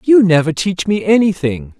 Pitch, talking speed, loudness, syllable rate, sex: 180 Hz, 170 wpm, -14 LUFS, 4.8 syllables/s, male